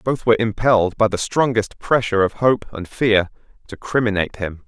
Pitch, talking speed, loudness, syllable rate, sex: 110 Hz, 180 wpm, -19 LUFS, 5.5 syllables/s, male